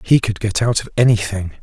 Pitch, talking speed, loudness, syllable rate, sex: 105 Hz, 220 wpm, -17 LUFS, 5.7 syllables/s, male